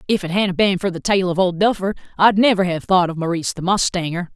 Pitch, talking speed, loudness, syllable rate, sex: 185 Hz, 235 wpm, -18 LUFS, 5.9 syllables/s, female